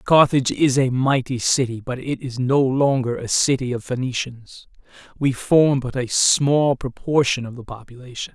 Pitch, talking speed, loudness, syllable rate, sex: 130 Hz, 165 wpm, -20 LUFS, 4.7 syllables/s, male